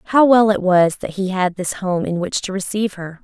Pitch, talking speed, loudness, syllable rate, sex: 190 Hz, 260 wpm, -18 LUFS, 5.4 syllables/s, female